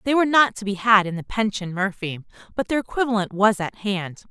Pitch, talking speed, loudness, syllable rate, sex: 210 Hz, 225 wpm, -21 LUFS, 5.8 syllables/s, female